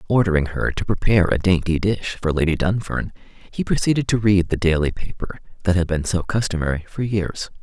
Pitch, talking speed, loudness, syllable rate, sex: 90 Hz, 190 wpm, -21 LUFS, 5.5 syllables/s, male